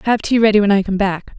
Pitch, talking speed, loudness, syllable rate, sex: 205 Hz, 305 wpm, -15 LUFS, 6.7 syllables/s, female